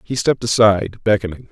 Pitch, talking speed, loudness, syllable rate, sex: 105 Hz, 160 wpm, -17 LUFS, 6.7 syllables/s, male